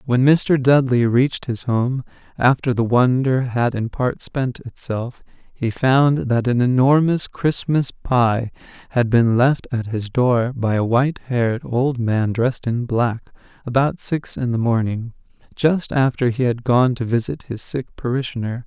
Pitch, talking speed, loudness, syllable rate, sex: 125 Hz, 165 wpm, -19 LUFS, 4.2 syllables/s, male